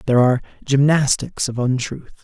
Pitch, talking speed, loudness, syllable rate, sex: 130 Hz, 135 wpm, -19 LUFS, 5.7 syllables/s, male